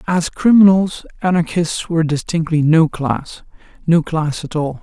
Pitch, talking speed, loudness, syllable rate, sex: 165 Hz, 125 wpm, -16 LUFS, 4.4 syllables/s, male